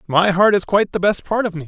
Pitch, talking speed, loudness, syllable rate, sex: 190 Hz, 325 wpm, -17 LUFS, 6.7 syllables/s, male